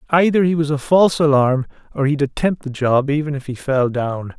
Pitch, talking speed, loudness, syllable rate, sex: 145 Hz, 220 wpm, -18 LUFS, 5.4 syllables/s, male